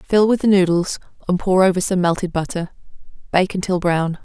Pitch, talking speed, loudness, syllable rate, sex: 185 Hz, 185 wpm, -18 LUFS, 5.4 syllables/s, female